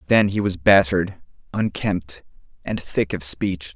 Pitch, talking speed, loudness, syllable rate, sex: 95 Hz, 145 wpm, -21 LUFS, 4.2 syllables/s, male